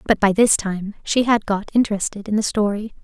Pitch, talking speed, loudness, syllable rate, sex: 210 Hz, 220 wpm, -19 LUFS, 5.5 syllables/s, female